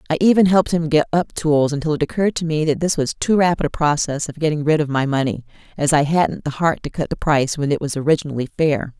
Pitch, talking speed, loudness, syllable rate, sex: 155 Hz, 260 wpm, -19 LUFS, 6.4 syllables/s, female